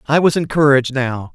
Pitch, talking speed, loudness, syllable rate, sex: 140 Hz, 180 wpm, -15 LUFS, 5.7 syllables/s, male